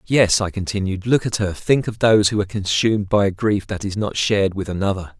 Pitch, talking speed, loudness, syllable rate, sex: 100 Hz, 240 wpm, -19 LUFS, 5.9 syllables/s, male